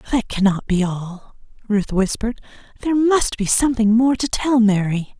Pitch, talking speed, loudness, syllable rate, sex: 225 Hz, 160 wpm, -18 LUFS, 5.0 syllables/s, female